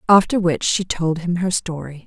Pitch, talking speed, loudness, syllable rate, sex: 175 Hz, 205 wpm, -19 LUFS, 4.8 syllables/s, female